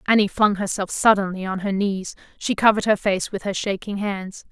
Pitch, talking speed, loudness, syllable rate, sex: 200 Hz, 200 wpm, -21 LUFS, 5.4 syllables/s, female